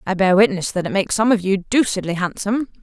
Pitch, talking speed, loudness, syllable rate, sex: 195 Hz, 235 wpm, -18 LUFS, 6.5 syllables/s, female